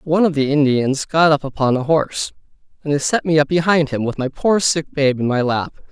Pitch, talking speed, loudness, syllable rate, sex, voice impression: 150 Hz, 245 wpm, -17 LUFS, 5.6 syllables/s, male, masculine, adult-like, slightly halting, slightly unique